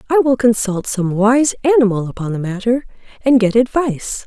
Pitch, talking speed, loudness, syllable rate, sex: 230 Hz, 170 wpm, -16 LUFS, 5.3 syllables/s, female